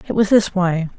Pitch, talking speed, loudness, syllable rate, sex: 190 Hz, 245 wpm, -17 LUFS, 5.3 syllables/s, female